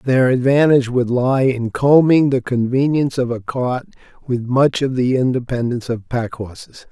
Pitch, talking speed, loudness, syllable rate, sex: 125 Hz, 165 wpm, -17 LUFS, 5.0 syllables/s, male